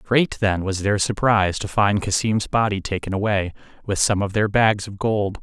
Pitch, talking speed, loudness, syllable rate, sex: 100 Hz, 200 wpm, -21 LUFS, 4.8 syllables/s, male